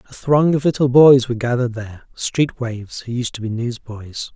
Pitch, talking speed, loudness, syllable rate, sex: 125 Hz, 195 wpm, -18 LUFS, 5.2 syllables/s, male